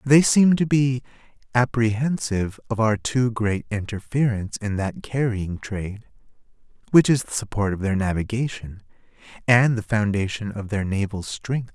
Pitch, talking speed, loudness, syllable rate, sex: 115 Hz, 145 wpm, -22 LUFS, 4.7 syllables/s, male